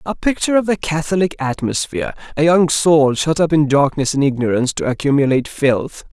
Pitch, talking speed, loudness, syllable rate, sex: 150 Hz, 175 wpm, -16 LUFS, 5.8 syllables/s, male